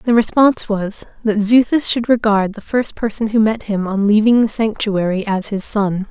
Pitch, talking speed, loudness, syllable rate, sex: 215 Hz, 195 wpm, -16 LUFS, 4.8 syllables/s, female